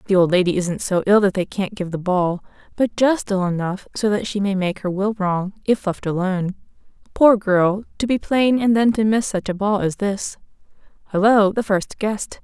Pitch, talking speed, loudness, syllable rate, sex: 200 Hz, 210 wpm, -19 LUFS, 4.9 syllables/s, female